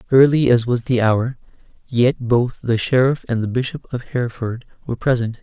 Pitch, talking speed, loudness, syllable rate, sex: 120 Hz, 175 wpm, -19 LUFS, 5.2 syllables/s, male